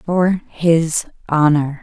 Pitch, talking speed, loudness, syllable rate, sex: 160 Hz, 100 wpm, -17 LUFS, 2.6 syllables/s, female